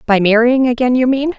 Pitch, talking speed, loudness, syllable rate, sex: 245 Hz, 215 wpm, -13 LUFS, 5.7 syllables/s, female